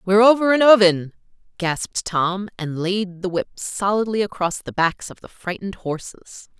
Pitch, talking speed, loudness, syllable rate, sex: 190 Hz, 165 wpm, -20 LUFS, 4.8 syllables/s, female